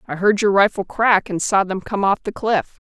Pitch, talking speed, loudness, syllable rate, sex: 200 Hz, 250 wpm, -18 LUFS, 5.1 syllables/s, female